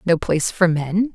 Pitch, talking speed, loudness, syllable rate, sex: 180 Hz, 210 wpm, -19 LUFS, 4.8 syllables/s, female